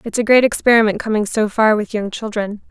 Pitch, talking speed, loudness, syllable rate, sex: 215 Hz, 220 wpm, -16 LUFS, 5.9 syllables/s, female